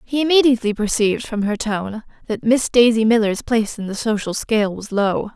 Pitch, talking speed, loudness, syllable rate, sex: 225 Hz, 190 wpm, -18 LUFS, 5.6 syllables/s, female